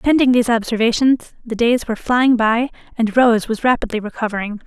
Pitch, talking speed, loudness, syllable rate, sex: 235 Hz, 165 wpm, -17 LUFS, 5.6 syllables/s, female